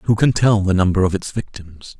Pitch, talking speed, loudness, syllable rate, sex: 100 Hz, 240 wpm, -17 LUFS, 5.1 syllables/s, male